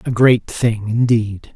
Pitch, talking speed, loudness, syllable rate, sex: 115 Hz, 155 wpm, -16 LUFS, 3.5 syllables/s, male